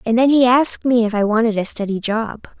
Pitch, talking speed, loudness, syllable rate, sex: 230 Hz, 255 wpm, -16 LUFS, 5.8 syllables/s, female